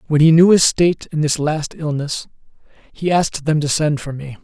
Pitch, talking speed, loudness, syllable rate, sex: 155 Hz, 215 wpm, -17 LUFS, 5.2 syllables/s, male